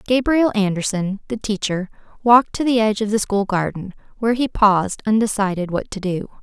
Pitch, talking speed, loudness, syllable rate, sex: 210 Hz, 175 wpm, -19 LUFS, 5.7 syllables/s, female